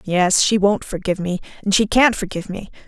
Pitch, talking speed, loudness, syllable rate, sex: 195 Hz, 210 wpm, -18 LUFS, 5.9 syllables/s, female